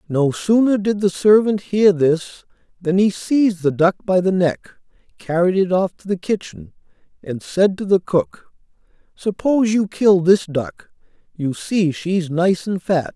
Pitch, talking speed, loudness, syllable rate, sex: 185 Hz, 170 wpm, -18 LUFS, 4.3 syllables/s, male